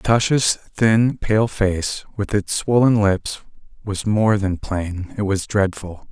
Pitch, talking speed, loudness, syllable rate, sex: 105 Hz, 135 wpm, -19 LUFS, 3.5 syllables/s, male